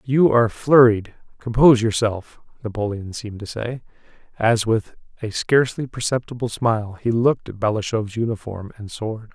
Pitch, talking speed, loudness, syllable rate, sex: 115 Hz, 135 wpm, -20 LUFS, 5.2 syllables/s, male